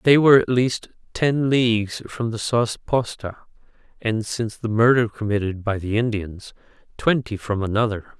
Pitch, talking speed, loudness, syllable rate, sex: 115 Hz, 155 wpm, -21 LUFS, 4.8 syllables/s, male